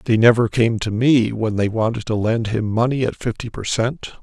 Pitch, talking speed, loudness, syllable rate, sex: 115 Hz, 225 wpm, -19 LUFS, 5.0 syllables/s, male